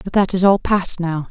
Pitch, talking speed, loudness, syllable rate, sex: 185 Hz, 275 wpm, -16 LUFS, 5.0 syllables/s, female